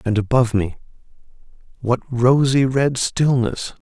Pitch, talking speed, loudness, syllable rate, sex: 125 Hz, 95 wpm, -19 LUFS, 4.1 syllables/s, male